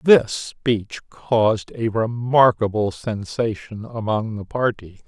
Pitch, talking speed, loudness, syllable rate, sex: 110 Hz, 105 wpm, -21 LUFS, 3.5 syllables/s, male